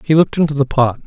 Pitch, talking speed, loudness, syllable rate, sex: 145 Hz, 285 wpm, -15 LUFS, 7.5 syllables/s, male